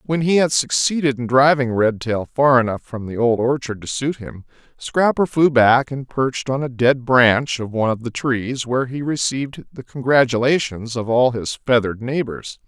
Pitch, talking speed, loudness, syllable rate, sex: 125 Hz, 190 wpm, -18 LUFS, 4.9 syllables/s, male